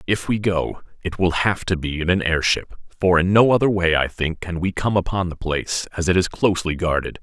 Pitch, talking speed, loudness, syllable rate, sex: 90 Hz, 240 wpm, -20 LUFS, 5.5 syllables/s, male